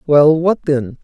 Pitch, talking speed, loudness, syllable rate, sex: 150 Hz, 175 wpm, -14 LUFS, 3.5 syllables/s, male